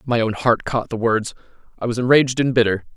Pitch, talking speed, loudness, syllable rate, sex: 120 Hz, 225 wpm, -19 LUFS, 6.1 syllables/s, male